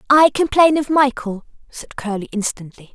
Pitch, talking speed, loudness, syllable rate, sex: 255 Hz, 145 wpm, -17 LUFS, 4.8 syllables/s, female